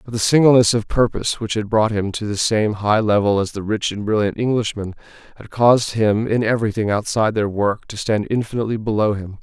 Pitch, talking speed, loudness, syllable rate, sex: 110 Hz, 210 wpm, -18 LUFS, 5.9 syllables/s, male